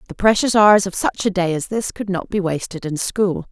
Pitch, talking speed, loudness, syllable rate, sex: 190 Hz, 255 wpm, -18 LUFS, 5.2 syllables/s, female